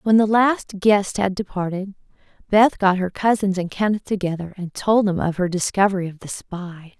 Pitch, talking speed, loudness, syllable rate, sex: 195 Hz, 190 wpm, -20 LUFS, 4.9 syllables/s, female